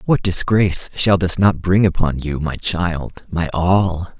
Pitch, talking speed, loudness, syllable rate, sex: 90 Hz, 170 wpm, -17 LUFS, 3.8 syllables/s, male